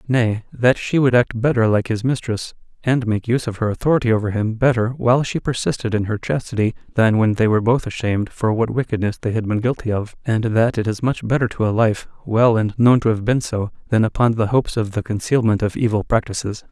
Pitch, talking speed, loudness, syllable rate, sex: 115 Hz, 230 wpm, -19 LUFS, 5.9 syllables/s, male